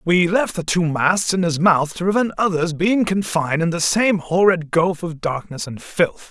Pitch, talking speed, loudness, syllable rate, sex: 175 Hz, 210 wpm, -19 LUFS, 4.6 syllables/s, male